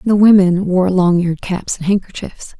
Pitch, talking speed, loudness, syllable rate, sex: 185 Hz, 185 wpm, -14 LUFS, 4.8 syllables/s, female